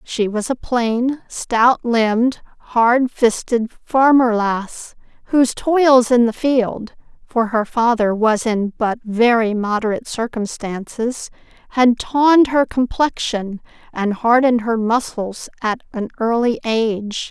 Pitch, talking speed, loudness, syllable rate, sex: 235 Hz, 120 wpm, -17 LUFS, 3.8 syllables/s, female